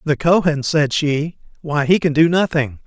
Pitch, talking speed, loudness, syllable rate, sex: 155 Hz, 190 wpm, -17 LUFS, 4.4 syllables/s, male